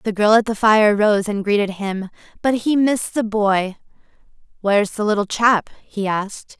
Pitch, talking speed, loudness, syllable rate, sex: 210 Hz, 180 wpm, -18 LUFS, 4.8 syllables/s, female